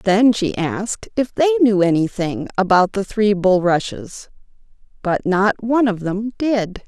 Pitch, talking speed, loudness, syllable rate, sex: 205 Hz, 150 wpm, -18 LUFS, 4.2 syllables/s, female